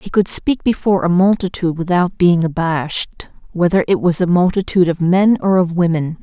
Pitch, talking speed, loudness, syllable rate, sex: 180 Hz, 185 wpm, -15 LUFS, 5.4 syllables/s, female